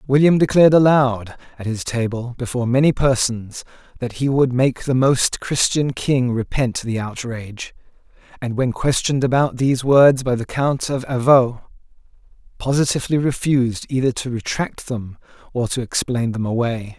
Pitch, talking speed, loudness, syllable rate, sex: 125 Hz, 150 wpm, -19 LUFS, 4.9 syllables/s, male